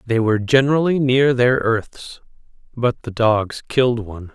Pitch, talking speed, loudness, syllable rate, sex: 120 Hz, 150 wpm, -18 LUFS, 4.6 syllables/s, male